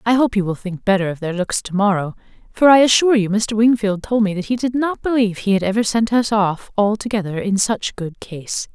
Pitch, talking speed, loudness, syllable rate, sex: 210 Hz, 240 wpm, -18 LUFS, 5.6 syllables/s, female